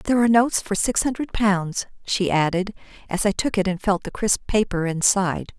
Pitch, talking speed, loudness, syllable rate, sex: 200 Hz, 205 wpm, -21 LUFS, 5.6 syllables/s, female